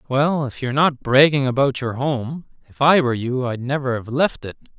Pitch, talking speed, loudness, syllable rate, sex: 135 Hz, 215 wpm, -19 LUFS, 5.3 syllables/s, male